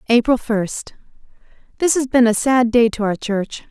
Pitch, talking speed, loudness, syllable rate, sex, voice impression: 235 Hz, 160 wpm, -17 LUFS, 4.5 syllables/s, female, feminine, slightly adult-like, slightly tensed, slightly refreshing, slightly unique